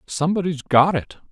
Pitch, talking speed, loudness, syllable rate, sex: 160 Hz, 135 wpm, -20 LUFS, 5.6 syllables/s, male